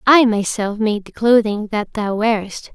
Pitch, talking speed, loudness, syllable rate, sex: 215 Hz, 175 wpm, -17 LUFS, 4.6 syllables/s, female